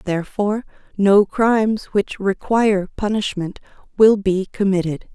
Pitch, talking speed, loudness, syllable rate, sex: 200 Hz, 105 wpm, -18 LUFS, 4.6 syllables/s, female